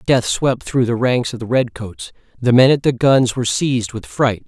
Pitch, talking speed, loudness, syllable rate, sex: 125 Hz, 240 wpm, -17 LUFS, 4.9 syllables/s, male